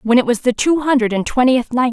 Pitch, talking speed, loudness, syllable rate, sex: 245 Hz, 280 wpm, -15 LUFS, 5.7 syllables/s, female